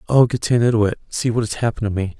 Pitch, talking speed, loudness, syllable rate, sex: 115 Hz, 220 wpm, -19 LUFS, 7.3 syllables/s, male